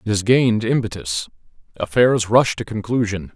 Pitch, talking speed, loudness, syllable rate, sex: 110 Hz, 145 wpm, -19 LUFS, 5.1 syllables/s, male